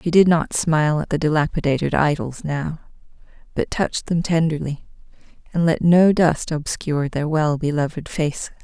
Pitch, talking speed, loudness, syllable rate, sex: 155 Hz, 155 wpm, -20 LUFS, 5.0 syllables/s, female